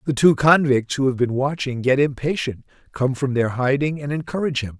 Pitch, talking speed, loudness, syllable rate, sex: 135 Hz, 200 wpm, -20 LUFS, 5.5 syllables/s, male